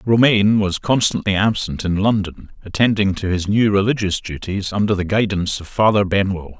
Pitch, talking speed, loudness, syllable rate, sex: 100 Hz, 165 wpm, -18 LUFS, 5.4 syllables/s, male